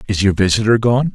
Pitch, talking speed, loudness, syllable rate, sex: 105 Hz, 210 wpm, -15 LUFS, 6.1 syllables/s, male